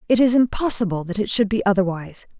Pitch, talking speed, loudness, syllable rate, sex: 210 Hz, 200 wpm, -19 LUFS, 6.6 syllables/s, female